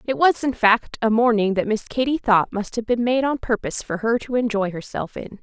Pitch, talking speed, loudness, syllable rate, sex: 225 Hz, 245 wpm, -21 LUFS, 5.4 syllables/s, female